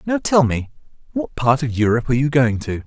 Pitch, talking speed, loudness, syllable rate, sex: 135 Hz, 230 wpm, -19 LUFS, 6.0 syllables/s, male